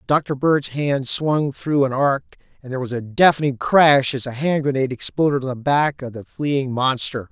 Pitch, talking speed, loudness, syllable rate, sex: 135 Hz, 205 wpm, -19 LUFS, 4.9 syllables/s, male